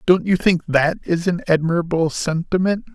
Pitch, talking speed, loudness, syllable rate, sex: 170 Hz, 165 wpm, -19 LUFS, 4.9 syllables/s, male